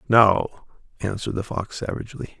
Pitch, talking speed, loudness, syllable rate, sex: 100 Hz, 125 wpm, -24 LUFS, 6.0 syllables/s, male